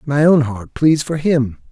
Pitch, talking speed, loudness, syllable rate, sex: 140 Hz, 210 wpm, -16 LUFS, 4.0 syllables/s, male